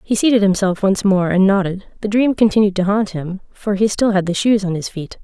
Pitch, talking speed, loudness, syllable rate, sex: 200 Hz, 250 wpm, -16 LUFS, 5.5 syllables/s, female